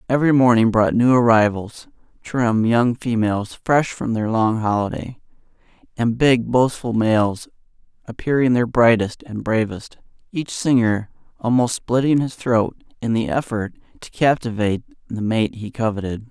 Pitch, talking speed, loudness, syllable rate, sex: 115 Hz, 130 wpm, -19 LUFS, 4.5 syllables/s, male